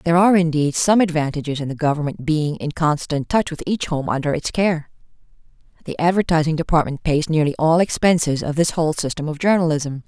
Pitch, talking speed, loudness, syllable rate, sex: 160 Hz, 185 wpm, -19 LUFS, 5.9 syllables/s, female